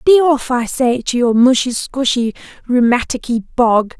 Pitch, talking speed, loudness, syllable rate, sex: 250 Hz, 150 wpm, -15 LUFS, 4.4 syllables/s, female